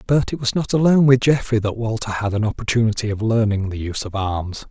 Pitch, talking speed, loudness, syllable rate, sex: 115 Hz, 230 wpm, -19 LUFS, 6.1 syllables/s, male